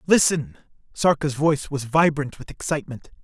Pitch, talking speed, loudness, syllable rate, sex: 150 Hz, 130 wpm, -22 LUFS, 5.3 syllables/s, male